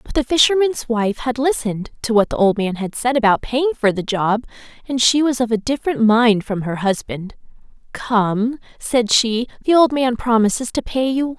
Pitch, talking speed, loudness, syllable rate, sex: 240 Hz, 205 wpm, -18 LUFS, 5.0 syllables/s, female